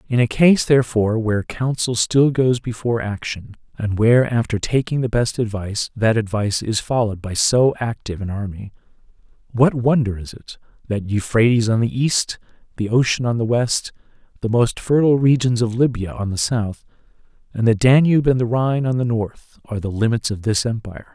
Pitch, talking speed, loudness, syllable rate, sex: 115 Hz, 180 wpm, -19 LUFS, 5.5 syllables/s, male